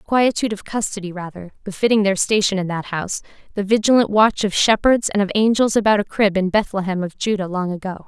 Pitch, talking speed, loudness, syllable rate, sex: 200 Hz, 200 wpm, -18 LUFS, 6.0 syllables/s, female